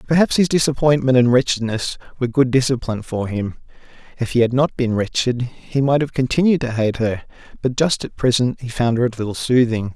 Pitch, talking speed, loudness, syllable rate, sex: 125 Hz, 200 wpm, -19 LUFS, 5.7 syllables/s, male